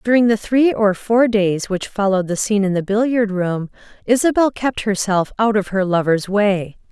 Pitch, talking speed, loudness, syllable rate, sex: 210 Hz, 190 wpm, -17 LUFS, 4.9 syllables/s, female